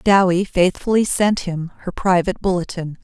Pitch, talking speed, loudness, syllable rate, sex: 185 Hz, 140 wpm, -19 LUFS, 4.7 syllables/s, female